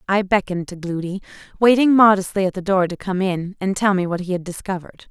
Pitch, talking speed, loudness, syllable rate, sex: 190 Hz, 225 wpm, -19 LUFS, 6.2 syllables/s, female